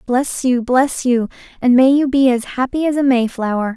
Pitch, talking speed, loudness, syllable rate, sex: 255 Hz, 205 wpm, -16 LUFS, 4.9 syllables/s, female